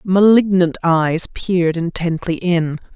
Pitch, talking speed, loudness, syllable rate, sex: 175 Hz, 100 wpm, -16 LUFS, 3.8 syllables/s, female